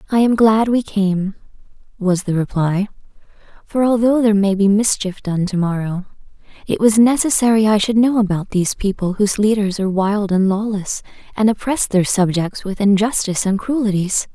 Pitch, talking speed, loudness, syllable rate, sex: 205 Hz, 165 wpm, -17 LUFS, 5.2 syllables/s, female